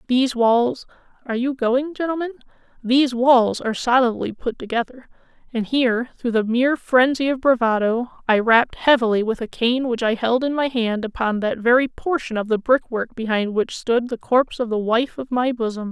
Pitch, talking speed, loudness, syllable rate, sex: 245 Hz, 185 wpm, -20 LUFS, 5.3 syllables/s, female